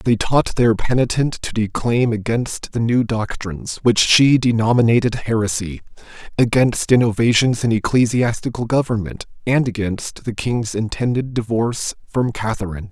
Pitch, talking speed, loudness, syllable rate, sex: 115 Hz, 125 wpm, -18 LUFS, 4.8 syllables/s, male